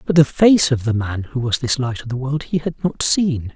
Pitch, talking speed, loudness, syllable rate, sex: 135 Hz, 285 wpm, -18 LUFS, 4.9 syllables/s, male